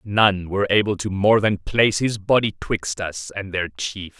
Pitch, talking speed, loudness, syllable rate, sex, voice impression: 100 Hz, 200 wpm, -21 LUFS, 4.6 syllables/s, male, masculine, adult-like, tensed, powerful, clear, nasal, slightly intellectual, slightly mature, slightly friendly, unique, wild, lively, slightly sharp